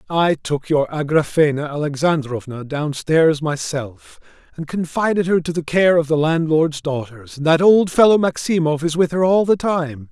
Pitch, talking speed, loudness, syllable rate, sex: 155 Hz, 165 wpm, -18 LUFS, 4.6 syllables/s, male